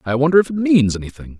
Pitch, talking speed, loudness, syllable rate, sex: 140 Hz, 260 wpm, -16 LUFS, 7.1 syllables/s, male